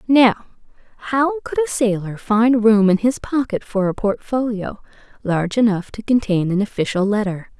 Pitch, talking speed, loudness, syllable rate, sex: 225 Hz, 160 wpm, -18 LUFS, 4.8 syllables/s, female